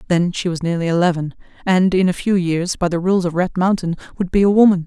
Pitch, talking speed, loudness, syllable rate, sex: 180 Hz, 245 wpm, -17 LUFS, 6.0 syllables/s, female